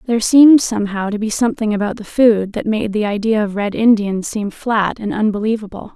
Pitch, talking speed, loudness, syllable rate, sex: 215 Hz, 200 wpm, -16 LUFS, 5.7 syllables/s, female